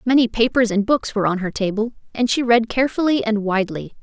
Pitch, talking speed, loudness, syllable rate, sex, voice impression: 225 Hz, 210 wpm, -19 LUFS, 6.3 syllables/s, female, feminine, slightly young, tensed, powerful, bright, clear, fluent, intellectual, friendly, lively, slightly sharp